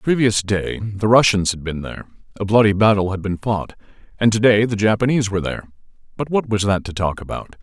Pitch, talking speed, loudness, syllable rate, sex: 105 Hz, 210 wpm, -18 LUFS, 6.2 syllables/s, male